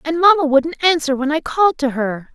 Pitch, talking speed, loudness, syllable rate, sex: 295 Hz, 230 wpm, -16 LUFS, 5.6 syllables/s, female